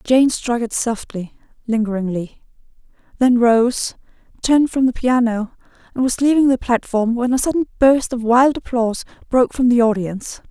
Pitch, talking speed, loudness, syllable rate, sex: 240 Hz, 155 wpm, -17 LUFS, 5.1 syllables/s, female